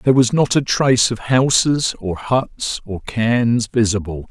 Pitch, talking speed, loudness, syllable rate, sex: 115 Hz, 165 wpm, -17 LUFS, 4.0 syllables/s, male